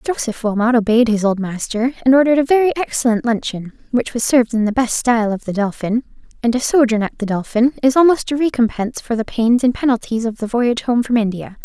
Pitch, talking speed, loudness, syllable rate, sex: 235 Hz, 220 wpm, -17 LUFS, 6.1 syllables/s, female